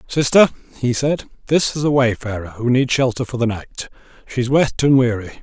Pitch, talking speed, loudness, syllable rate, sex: 125 Hz, 200 wpm, -18 LUFS, 5.3 syllables/s, male